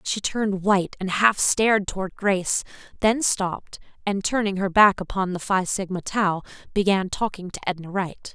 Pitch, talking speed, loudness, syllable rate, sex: 195 Hz, 175 wpm, -23 LUFS, 5.0 syllables/s, female